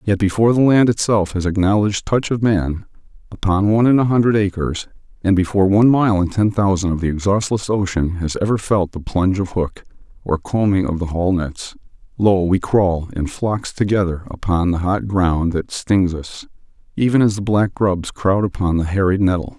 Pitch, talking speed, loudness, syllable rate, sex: 95 Hz, 195 wpm, -18 LUFS, 5.2 syllables/s, male